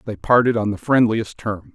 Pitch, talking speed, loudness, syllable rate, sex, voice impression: 110 Hz, 205 wpm, -19 LUFS, 5.0 syllables/s, male, very masculine, very middle-aged, very thick, tensed, very powerful, bright, soft, muffled, fluent, cool, slightly intellectual, refreshing, slightly sincere, calm, mature, slightly friendly, slightly reassuring, unique, slightly elegant, very wild, slightly sweet, lively, slightly strict, slightly intense